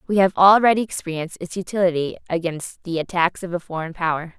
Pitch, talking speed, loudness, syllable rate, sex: 175 Hz, 180 wpm, -20 LUFS, 6.2 syllables/s, female